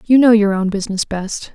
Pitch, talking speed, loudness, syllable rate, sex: 210 Hz, 230 wpm, -16 LUFS, 5.5 syllables/s, female